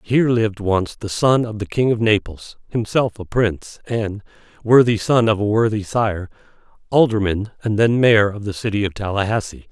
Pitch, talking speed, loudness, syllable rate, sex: 105 Hz, 165 wpm, -18 LUFS, 5.1 syllables/s, male